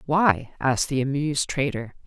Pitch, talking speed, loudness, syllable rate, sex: 145 Hz, 145 wpm, -24 LUFS, 5.1 syllables/s, female